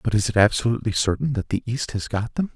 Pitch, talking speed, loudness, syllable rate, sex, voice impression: 110 Hz, 260 wpm, -23 LUFS, 6.6 syllables/s, male, very masculine, very adult-like, middle-aged, very thick, tensed, powerful, bright, slightly soft, clear, very cool, intellectual, sincere, very calm, very mature, friendly, reassuring, very unique, elegant, wild, sweet, slightly lively, kind